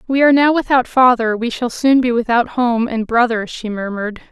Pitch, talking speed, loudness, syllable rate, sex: 240 Hz, 210 wpm, -15 LUFS, 5.4 syllables/s, female